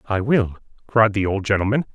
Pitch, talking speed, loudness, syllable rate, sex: 105 Hz, 185 wpm, -20 LUFS, 5.5 syllables/s, male